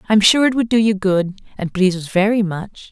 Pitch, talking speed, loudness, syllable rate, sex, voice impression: 200 Hz, 245 wpm, -17 LUFS, 5.6 syllables/s, female, feminine, adult-like, slightly clear, slightly intellectual, slightly unique